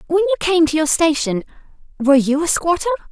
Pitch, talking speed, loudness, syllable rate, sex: 300 Hz, 195 wpm, -17 LUFS, 6.2 syllables/s, female